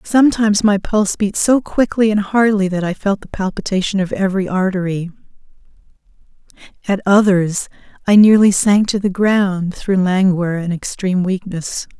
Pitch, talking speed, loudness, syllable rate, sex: 195 Hz, 145 wpm, -16 LUFS, 5.0 syllables/s, female